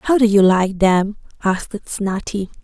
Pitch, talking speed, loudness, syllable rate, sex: 200 Hz, 160 wpm, -17 LUFS, 4.1 syllables/s, female